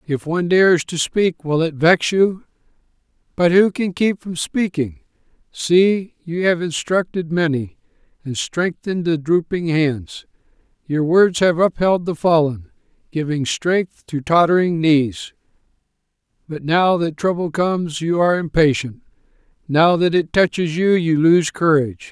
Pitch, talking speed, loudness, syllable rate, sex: 165 Hz, 140 wpm, -18 LUFS, 4.3 syllables/s, male